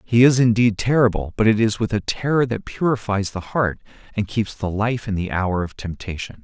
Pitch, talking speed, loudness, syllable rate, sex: 110 Hz, 215 wpm, -20 LUFS, 5.2 syllables/s, male